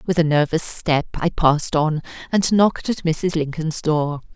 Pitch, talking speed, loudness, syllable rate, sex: 160 Hz, 180 wpm, -20 LUFS, 4.5 syllables/s, female